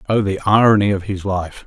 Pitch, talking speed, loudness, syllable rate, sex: 100 Hz, 215 wpm, -17 LUFS, 5.7 syllables/s, male